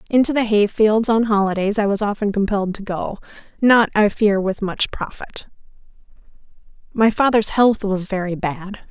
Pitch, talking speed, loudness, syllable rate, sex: 205 Hz, 155 wpm, -18 LUFS, 4.9 syllables/s, female